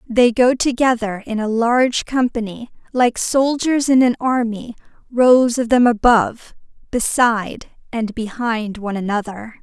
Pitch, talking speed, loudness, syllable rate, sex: 235 Hz, 130 wpm, -17 LUFS, 4.3 syllables/s, female